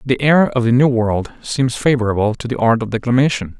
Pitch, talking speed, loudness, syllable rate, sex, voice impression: 120 Hz, 215 wpm, -16 LUFS, 5.6 syllables/s, male, very masculine, middle-aged, thick, slightly fluent, cool, sincere, slightly elegant